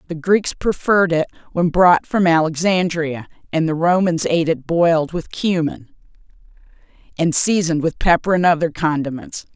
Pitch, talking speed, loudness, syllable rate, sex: 165 Hz, 145 wpm, -17 LUFS, 5.0 syllables/s, female